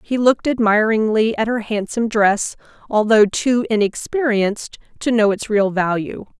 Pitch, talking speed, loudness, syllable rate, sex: 220 Hz, 140 wpm, -18 LUFS, 4.8 syllables/s, female